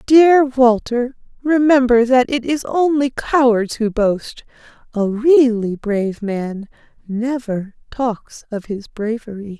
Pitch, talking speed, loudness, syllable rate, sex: 240 Hz, 120 wpm, -17 LUFS, 3.6 syllables/s, female